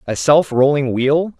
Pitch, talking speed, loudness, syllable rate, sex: 145 Hz, 170 wpm, -15 LUFS, 4.1 syllables/s, male